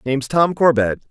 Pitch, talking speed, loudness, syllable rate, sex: 140 Hz, 165 wpm, -17 LUFS, 5.1 syllables/s, male